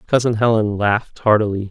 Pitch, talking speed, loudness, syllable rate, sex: 110 Hz, 140 wpm, -17 LUFS, 5.7 syllables/s, male